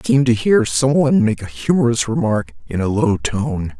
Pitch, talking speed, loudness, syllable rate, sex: 120 Hz, 220 wpm, -17 LUFS, 5.3 syllables/s, male